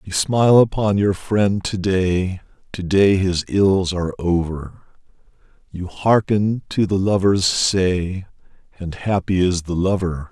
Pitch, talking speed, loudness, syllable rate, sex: 95 Hz, 140 wpm, -18 LUFS, 3.8 syllables/s, male